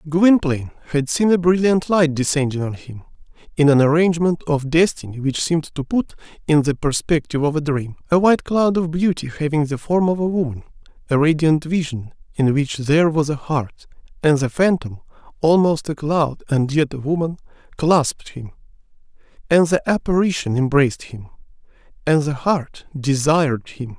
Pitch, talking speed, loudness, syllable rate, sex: 150 Hz, 165 wpm, -19 LUFS, 5.3 syllables/s, male